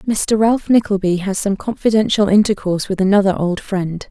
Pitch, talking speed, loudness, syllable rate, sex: 200 Hz, 160 wpm, -16 LUFS, 5.4 syllables/s, female